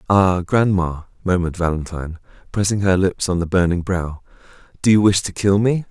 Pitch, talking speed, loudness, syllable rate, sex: 95 Hz, 175 wpm, -19 LUFS, 5.6 syllables/s, male